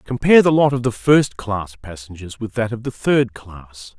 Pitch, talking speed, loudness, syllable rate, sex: 115 Hz, 210 wpm, -17 LUFS, 4.7 syllables/s, male